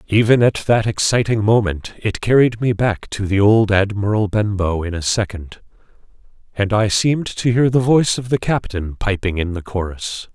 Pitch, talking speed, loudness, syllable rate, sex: 105 Hz, 180 wpm, -17 LUFS, 4.9 syllables/s, male